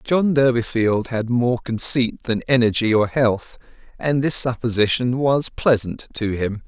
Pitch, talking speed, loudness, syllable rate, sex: 120 Hz, 145 wpm, -19 LUFS, 4.1 syllables/s, male